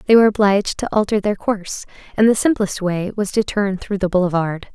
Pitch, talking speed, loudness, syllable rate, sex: 200 Hz, 215 wpm, -18 LUFS, 6.1 syllables/s, female